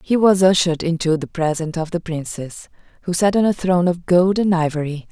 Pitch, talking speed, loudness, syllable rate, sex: 170 Hz, 210 wpm, -18 LUFS, 5.8 syllables/s, female